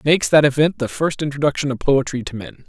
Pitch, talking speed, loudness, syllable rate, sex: 140 Hz, 245 wpm, -18 LUFS, 6.6 syllables/s, male